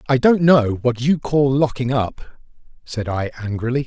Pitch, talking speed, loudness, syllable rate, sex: 130 Hz, 170 wpm, -18 LUFS, 4.7 syllables/s, male